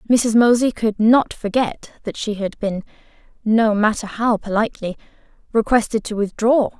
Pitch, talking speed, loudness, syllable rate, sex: 220 Hz, 140 wpm, -19 LUFS, 3.8 syllables/s, female